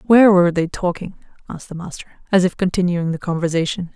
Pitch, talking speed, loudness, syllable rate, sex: 180 Hz, 180 wpm, -18 LUFS, 6.9 syllables/s, female